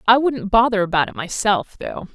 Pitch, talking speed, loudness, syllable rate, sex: 210 Hz, 195 wpm, -19 LUFS, 5.1 syllables/s, female